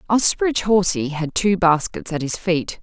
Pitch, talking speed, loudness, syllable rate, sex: 180 Hz, 170 wpm, -19 LUFS, 4.9 syllables/s, female